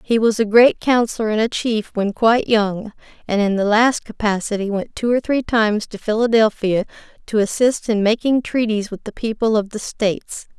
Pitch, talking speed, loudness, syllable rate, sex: 220 Hz, 195 wpm, -18 LUFS, 5.1 syllables/s, female